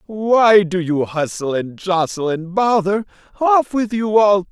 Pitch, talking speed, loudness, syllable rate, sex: 195 Hz, 160 wpm, -17 LUFS, 3.8 syllables/s, male